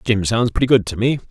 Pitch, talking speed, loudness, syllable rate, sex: 115 Hz, 275 wpm, -17 LUFS, 6.2 syllables/s, male